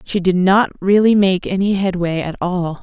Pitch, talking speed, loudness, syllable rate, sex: 185 Hz, 190 wpm, -16 LUFS, 4.5 syllables/s, female